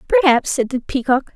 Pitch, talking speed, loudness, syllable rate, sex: 250 Hz, 175 wpm, -17 LUFS, 6.8 syllables/s, female